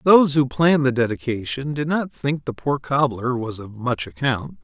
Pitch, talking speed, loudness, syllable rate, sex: 140 Hz, 195 wpm, -21 LUFS, 4.9 syllables/s, male